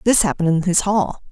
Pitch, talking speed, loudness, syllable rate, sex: 185 Hz, 230 wpm, -18 LUFS, 6.3 syllables/s, female